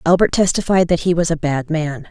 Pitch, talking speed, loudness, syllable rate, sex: 165 Hz, 230 wpm, -17 LUFS, 5.5 syllables/s, female